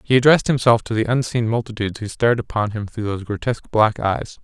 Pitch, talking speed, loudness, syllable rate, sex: 115 Hz, 215 wpm, -19 LUFS, 6.5 syllables/s, male